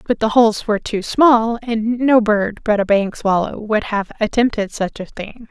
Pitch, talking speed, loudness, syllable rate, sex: 220 Hz, 205 wpm, -17 LUFS, 4.6 syllables/s, female